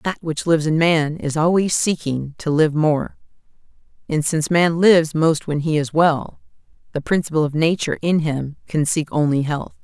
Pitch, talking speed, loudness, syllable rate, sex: 155 Hz, 185 wpm, -19 LUFS, 5.0 syllables/s, female